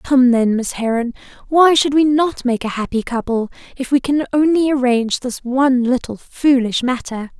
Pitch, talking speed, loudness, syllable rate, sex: 255 Hz, 180 wpm, -16 LUFS, 4.9 syllables/s, female